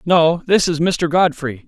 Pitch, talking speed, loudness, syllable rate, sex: 165 Hz, 180 wpm, -16 LUFS, 4.0 syllables/s, male